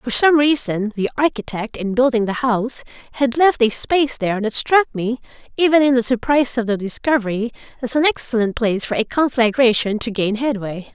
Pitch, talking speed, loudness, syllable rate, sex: 240 Hz, 185 wpm, -18 LUFS, 5.5 syllables/s, female